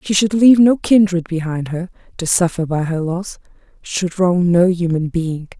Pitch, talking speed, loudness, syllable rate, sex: 175 Hz, 170 wpm, -16 LUFS, 4.7 syllables/s, female